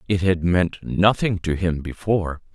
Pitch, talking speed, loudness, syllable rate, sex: 90 Hz, 165 wpm, -21 LUFS, 4.5 syllables/s, male